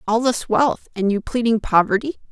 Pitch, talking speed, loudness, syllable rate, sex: 225 Hz, 180 wpm, -19 LUFS, 5.0 syllables/s, female